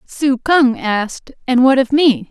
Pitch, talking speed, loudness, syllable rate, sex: 260 Hz, 180 wpm, -14 LUFS, 3.9 syllables/s, female